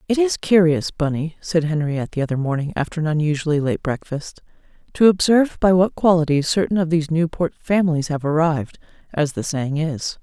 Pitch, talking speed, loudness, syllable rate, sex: 160 Hz, 175 wpm, -20 LUFS, 5.8 syllables/s, female